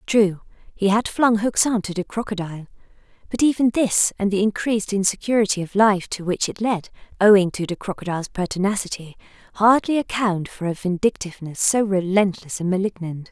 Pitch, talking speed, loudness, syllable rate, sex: 200 Hz, 160 wpm, -21 LUFS, 5.6 syllables/s, female